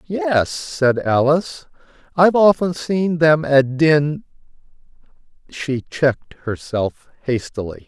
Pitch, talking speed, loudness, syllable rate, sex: 150 Hz, 100 wpm, -18 LUFS, 3.0 syllables/s, male